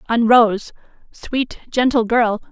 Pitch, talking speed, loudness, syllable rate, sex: 230 Hz, 120 wpm, -17 LUFS, 3.4 syllables/s, female